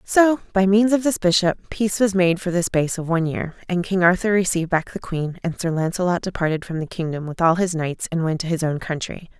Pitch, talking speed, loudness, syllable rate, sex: 180 Hz, 250 wpm, -21 LUFS, 5.9 syllables/s, female